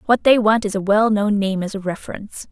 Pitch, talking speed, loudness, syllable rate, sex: 205 Hz, 240 wpm, -18 LUFS, 5.9 syllables/s, female